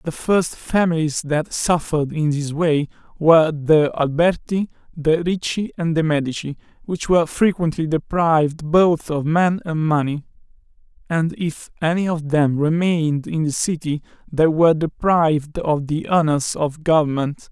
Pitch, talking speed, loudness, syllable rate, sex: 160 Hz, 145 wpm, -19 LUFS, 4.5 syllables/s, male